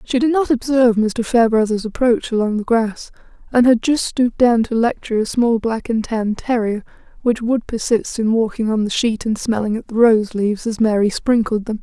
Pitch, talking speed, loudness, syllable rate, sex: 230 Hz, 210 wpm, -17 LUFS, 5.3 syllables/s, female